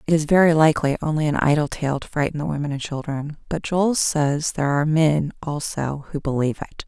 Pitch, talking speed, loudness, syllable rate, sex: 150 Hz, 210 wpm, -21 LUFS, 5.8 syllables/s, female